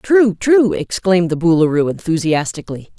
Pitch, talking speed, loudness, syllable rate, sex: 185 Hz, 100 wpm, -15 LUFS, 5.3 syllables/s, female